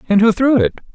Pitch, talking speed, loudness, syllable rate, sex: 205 Hz, 255 wpm, -14 LUFS, 6.2 syllables/s, male